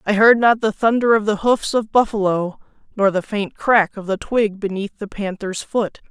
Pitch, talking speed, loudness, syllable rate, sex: 210 Hz, 205 wpm, -18 LUFS, 4.7 syllables/s, female